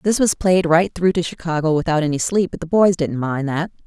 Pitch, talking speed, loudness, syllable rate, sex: 170 Hz, 250 wpm, -18 LUFS, 5.5 syllables/s, female